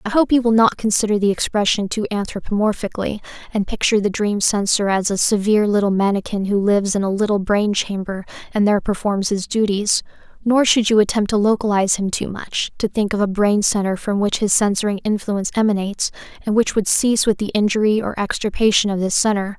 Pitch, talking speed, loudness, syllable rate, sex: 205 Hz, 200 wpm, -18 LUFS, 6.0 syllables/s, female